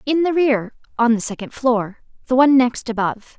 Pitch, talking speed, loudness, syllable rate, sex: 245 Hz, 175 wpm, -18 LUFS, 5.4 syllables/s, female